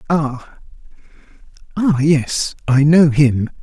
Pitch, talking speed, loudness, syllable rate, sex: 145 Hz, 85 wpm, -15 LUFS, 2.8 syllables/s, male